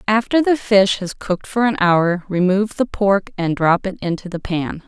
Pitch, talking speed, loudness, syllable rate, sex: 195 Hz, 210 wpm, -18 LUFS, 4.8 syllables/s, female